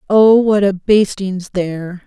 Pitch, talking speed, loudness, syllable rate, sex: 195 Hz, 145 wpm, -14 LUFS, 3.9 syllables/s, female